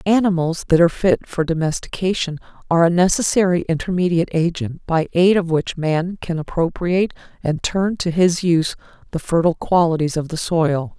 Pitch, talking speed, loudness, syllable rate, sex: 170 Hz, 160 wpm, -19 LUFS, 5.5 syllables/s, female